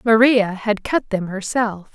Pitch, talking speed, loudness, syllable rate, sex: 215 Hz, 155 wpm, -19 LUFS, 3.8 syllables/s, female